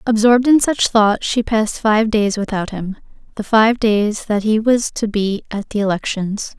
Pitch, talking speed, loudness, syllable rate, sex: 215 Hz, 190 wpm, -16 LUFS, 4.5 syllables/s, female